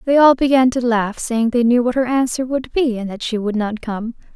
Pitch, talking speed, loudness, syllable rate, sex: 240 Hz, 260 wpm, -17 LUFS, 5.2 syllables/s, female